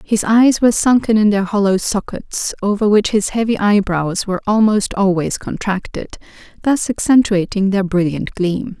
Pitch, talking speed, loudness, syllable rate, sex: 205 Hz, 150 wpm, -16 LUFS, 4.8 syllables/s, female